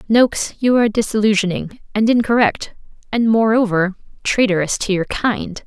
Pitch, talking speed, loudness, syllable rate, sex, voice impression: 215 Hz, 125 wpm, -17 LUFS, 5.1 syllables/s, female, feminine, adult-like, tensed, powerful, slightly hard, slightly muffled, slightly raspy, intellectual, calm, reassuring, elegant, lively, slightly sharp